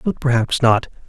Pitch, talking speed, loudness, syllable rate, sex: 130 Hz, 165 wpm, -17 LUFS, 4.9 syllables/s, male